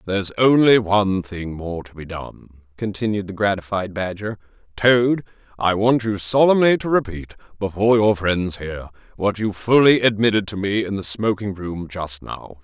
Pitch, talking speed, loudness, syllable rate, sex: 100 Hz, 165 wpm, -19 LUFS, 4.9 syllables/s, male